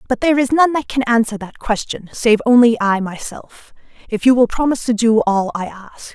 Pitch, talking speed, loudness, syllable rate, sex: 235 Hz, 215 wpm, -16 LUFS, 5.3 syllables/s, female